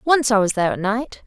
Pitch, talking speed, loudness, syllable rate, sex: 230 Hz, 285 wpm, -19 LUFS, 6.0 syllables/s, female